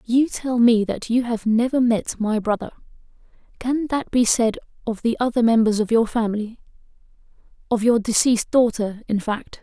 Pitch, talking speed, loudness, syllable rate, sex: 230 Hz, 160 wpm, -20 LUFS, 5.0 syllables/s, female